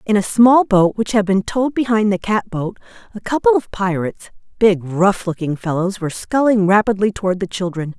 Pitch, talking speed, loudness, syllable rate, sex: 200 Hz, 175 wpm, -17 LUFS, 5.4 syllables/s, female